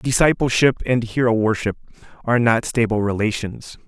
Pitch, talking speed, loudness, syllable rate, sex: 115 Hz, 125 wpm, -19 LUFS, 5.2 syllables/s, male